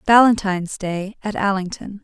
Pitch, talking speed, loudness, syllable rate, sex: 200 Hz, 120 wpm, -20 LUFS, 4.9 syllables/s, female